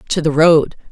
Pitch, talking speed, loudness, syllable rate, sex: 155 Hz, 195 wpm, -13 LUFS, 4.8 syllables/s, female